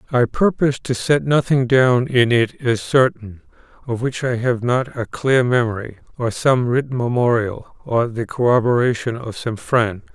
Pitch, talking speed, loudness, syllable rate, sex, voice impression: 120 Hz, 165 wpm, -18 LUFS, 4.5 syllables/s, male, masculine, adult-like, relaxed, weak, slightly dark, slightly muffled, halting, sincere, calm, friendly, wild, kind, modest